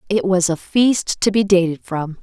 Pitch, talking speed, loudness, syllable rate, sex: 190 Hz, 215 wpm, -17 LUFS, 4.5 syllables/s, female